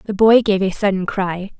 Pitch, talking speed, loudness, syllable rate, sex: 200 Hz, 225 wpm, -16 LUFS, 5.0 syllables/s, female